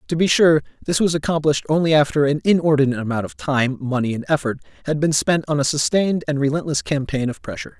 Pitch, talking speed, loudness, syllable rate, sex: 150 Hz, 210 wpm, -19 LUFS, 6.6 syllables/s, male